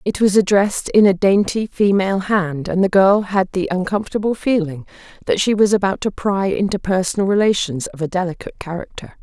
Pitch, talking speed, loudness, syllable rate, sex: 195 Hz, 180 wpm, -17 LUFS, 5.7 syllables/s, female